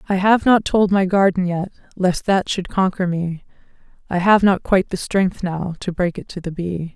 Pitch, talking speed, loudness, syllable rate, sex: 185 Hz, 215 wpm, -19 LUFS, 4.8 syllables/s, female